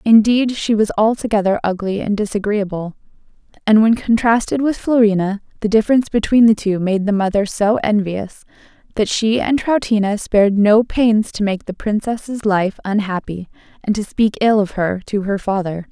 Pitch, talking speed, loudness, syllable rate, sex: 210 Hz, 165 wpm, -17 LUFS, 5.0 syllables/s, female